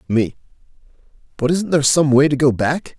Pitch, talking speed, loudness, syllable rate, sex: 140 Hz, 180 wpm, -17 LUFS, 5.6 syllables/s, male